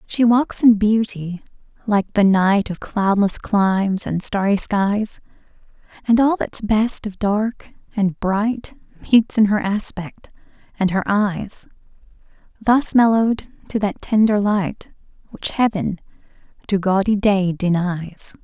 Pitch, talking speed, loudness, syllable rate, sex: 205 Hz, 130 wpm, -19 LUFS, 3.6 syllables/s, female